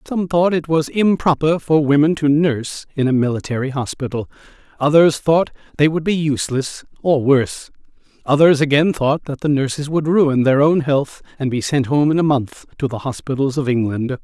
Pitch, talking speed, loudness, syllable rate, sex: 145 Hz, 185 wpm, -17 LUFS, 5.2 syllables/s, male